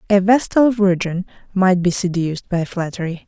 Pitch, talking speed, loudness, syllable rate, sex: 190 Hz, 145 wpm, -18 LUFS, 5.0 syllables/s, female